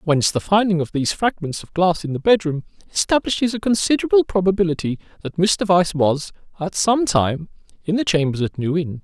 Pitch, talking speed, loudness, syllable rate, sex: 180 Hz, 185 wpm, -19 LUFS, 5.7 syllables/s, male